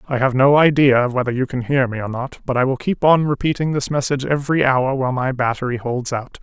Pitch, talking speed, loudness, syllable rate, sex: 130 Hz, 250 wpm, -18 LUFS, 6.1 syllables/s, male